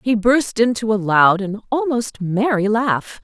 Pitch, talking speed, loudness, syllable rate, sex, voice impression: 220 Hz, 165 wpm, -18 LUFS, 4.0 syllables/s, female, feminine, adult-like, tensed, powerful, clear, fluent, intellectual, lively, strict, sharp